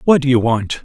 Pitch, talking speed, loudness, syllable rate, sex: 130 Hz, 285 wpm, -15 LUFS, 5.6 syllables/s, male